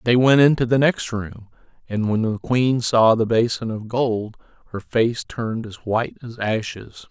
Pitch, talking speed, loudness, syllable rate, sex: 115 Hz, 185 wpm, -20 LUFS, 4.4 syllables/s, male